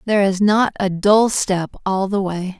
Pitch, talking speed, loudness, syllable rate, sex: 195 Hz, 210 wpm, -18 LUFS, 4.4 syllables/s, female